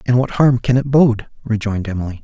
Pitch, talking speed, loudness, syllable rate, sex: 115 Hz, 215 wpm, -16 LUFS, 6.1 syllables/s, male